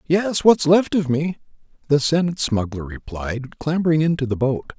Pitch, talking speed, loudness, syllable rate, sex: 145 Hz, 165 wpm, -20 LUFS, 5.0 syllables/s, male